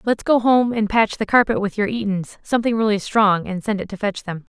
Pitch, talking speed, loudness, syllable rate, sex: 210 Hz, 225 wpm, -19 LUFS, 5.5 syllables/s, female